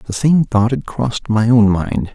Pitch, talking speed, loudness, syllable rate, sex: 115 Hz, 225 wpm, -15 LUFS, 4.3 syllables/s, male